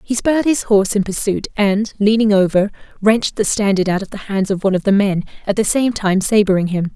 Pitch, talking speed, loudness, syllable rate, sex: 205 Hz, 235 wpm, -16 LUFS, 6.0 syllables/s, female